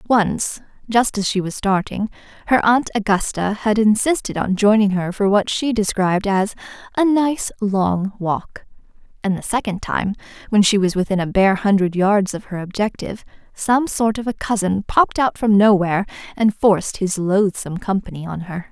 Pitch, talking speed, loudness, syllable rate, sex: 205 Hz, 175 wpm, -19 LUFS, 4.9 syllables/s, female